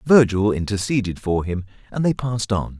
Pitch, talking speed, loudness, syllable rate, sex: 105 Hz, 170 wpm, -21 LUFS, 5.4 syllables/s, male